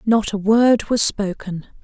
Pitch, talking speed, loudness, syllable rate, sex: 210 Hz, 165 wpm, -17 LUFS, 3.8 syllables/s, female